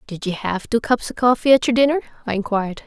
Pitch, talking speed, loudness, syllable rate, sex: 230 Hz, 250 wpm, -19 LUFS, 6.5 syllables/s, female